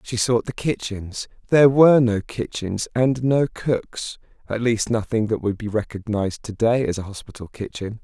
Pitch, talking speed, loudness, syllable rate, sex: 115 Hz, 180 wpm, -21 LUFS, 4.8 syllables/s, male